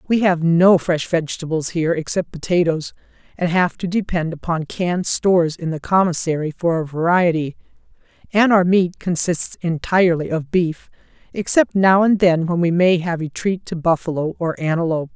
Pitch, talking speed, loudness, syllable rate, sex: 170 Hz, 165 wpm, -18 LUFS, 5.1 syllables/s, female